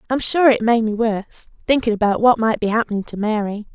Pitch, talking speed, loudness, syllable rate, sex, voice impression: 225 Hz, 225 wpm, -18 LUFS, 6.0 syllables/s, female, feminine, adult-like, tensed, clear, fluent, slightly raspy, intellectual, elegant, strict, sharp